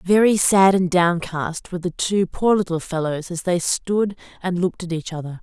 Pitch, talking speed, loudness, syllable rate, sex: 180 Hz, 200 wpm, -20 LUFS, 4.9 syllables/s, female